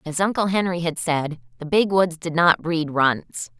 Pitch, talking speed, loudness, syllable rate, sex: 165 Hz, 200 wpm, -21 LUFS, 4.3 syllables/s, female